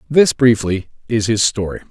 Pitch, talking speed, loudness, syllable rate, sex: 115 Hz, 155 wpm, -16 LUFS, 4.9 syllables/s, male